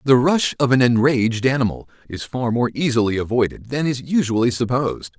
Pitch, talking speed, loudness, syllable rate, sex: 125 Hz, 175 wpm, -19 LUFS, 5.7 syllables/s, male